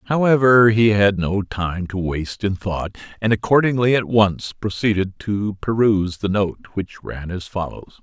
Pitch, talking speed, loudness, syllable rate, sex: 100 Hz, 165 wpm, -19 LUFS, 4.4 syllables/s, male